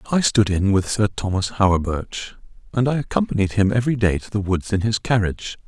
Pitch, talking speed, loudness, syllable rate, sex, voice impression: 105 Hz, 200 wpm, -20 LUFS, 5.8 syllables/s, male, masculine, middle-aged, slightly relaxed, slightly halting, raspy, cool, sincere, calm, slightly mature, wild, kind, modest